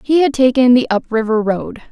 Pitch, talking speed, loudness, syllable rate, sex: 245 Hz, 220 wpm, -14 LUFS, 5.3 syllables/s, female